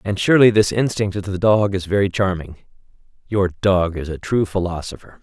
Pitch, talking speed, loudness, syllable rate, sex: 95 Hz, 170 wpm, -18 LUFS, 5.5 syllables/s, male